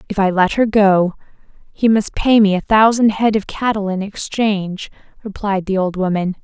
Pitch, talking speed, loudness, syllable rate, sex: 200 Hz, 185 wpm, -16 LUFS, 4.8 syllables/s, female